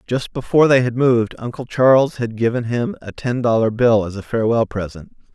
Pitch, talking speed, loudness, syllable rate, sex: 120 Hz, 200 wpm, -18 LUFS, 5.7 syllables/s, male